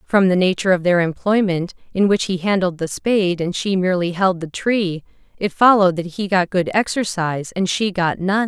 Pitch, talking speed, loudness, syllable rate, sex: 185 Hz, 205 wpm, -18 LUFS, 5.3 syllables/s, female